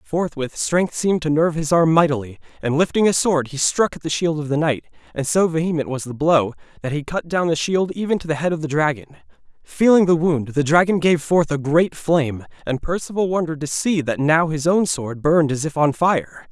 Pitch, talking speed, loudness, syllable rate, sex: 160 Hz, 235 wpm, -19 LUFS, 5.5 syllables/s, male